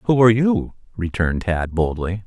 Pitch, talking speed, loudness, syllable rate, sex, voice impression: 100 Hz, 160 wpm, -20 LUFS, 5.0 syllables/s, male, very masculine, very adult-like, middle-aged, very thick, tensed, very powerful, slightly bright, hard, slightly soft, muffled, fluent, slightly raspy, very cool, intellectual, very sincere, very calm, very mature, very friendly, very reassuring, very unique, very elegant, slightly wild, very sweet, very kind, slightly modest